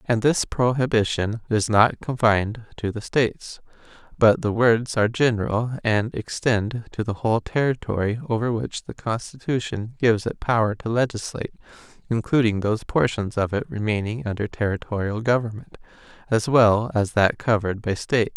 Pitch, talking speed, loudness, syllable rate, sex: 115 Hz, 145 wpm, -23 LUFS, 5.2 syllables/s, male